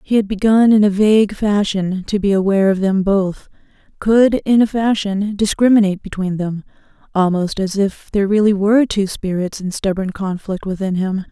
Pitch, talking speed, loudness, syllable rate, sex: 200 Hz, 175 wpm, -16 LUFS, 5.2 syllables/s, female